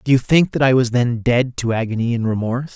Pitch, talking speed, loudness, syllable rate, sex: 125 Hz, 260 wpm, -18 LUFS, 6.0 syllables/s, male